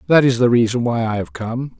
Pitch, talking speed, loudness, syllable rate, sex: 120 Hz, 265 wpm, -18 LUFS, 5.6 syllables/s, male